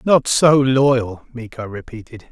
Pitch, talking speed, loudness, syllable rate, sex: 125 Hz, 130 wpm, -15 LUFS, 3.8 syllables/s, male